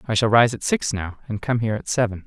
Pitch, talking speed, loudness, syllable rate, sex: 115 Hz, 290 wpm, -21 LUFS, 6.3 syllables/s, male